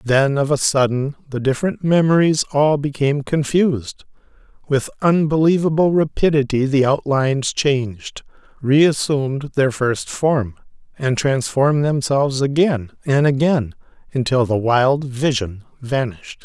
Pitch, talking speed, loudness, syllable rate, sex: 140 Hz, 115 wpm, -18 LUFS, 4.5 syllables/s, male